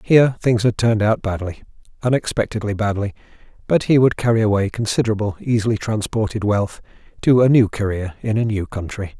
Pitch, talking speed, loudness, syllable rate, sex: 110 Hz, 155 wpm, -19 LUFS, 5.9 syllables/s, male